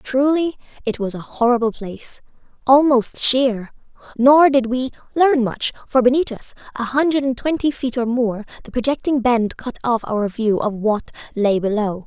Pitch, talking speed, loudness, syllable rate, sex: 245 Hz, 170 wpm, -19 LUFS, 4.6 syllables/s, female